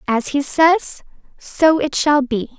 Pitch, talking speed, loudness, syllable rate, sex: 280 Hz, 165 wpm, -16 LUFS, 3.5 syllables/s, female